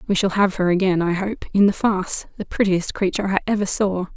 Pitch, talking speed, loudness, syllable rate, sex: 190 Hz, 230 wpm, -20 LUFS, 6.0 syllables/s, female